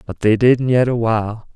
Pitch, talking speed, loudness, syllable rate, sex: 115 Hz, 230 wpm, -16 LUFS, 5.3 syllables/s, male